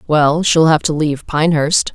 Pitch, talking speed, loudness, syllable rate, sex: 155 Hz, 185 wpm, -14 LUFS, 5.0 syllables/s, female